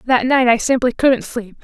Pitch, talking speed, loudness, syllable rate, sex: 245 Hz, 220 wpm, -15 LUFS, 4.7 syllables/s, female